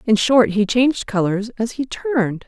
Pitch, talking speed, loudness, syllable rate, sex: 230 Hz, 195 wpm, -18 LUFS, 4.7 syllables/s, female